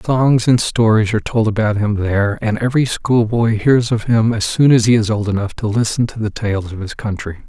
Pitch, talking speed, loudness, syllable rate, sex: 110 Hz, 240 wpm, -16 LUFS, 5.3 syllables/s, male